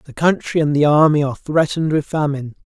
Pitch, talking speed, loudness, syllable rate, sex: 150 Hz, 200 wpm, -17 LUFS, 6.5 syllables/s, male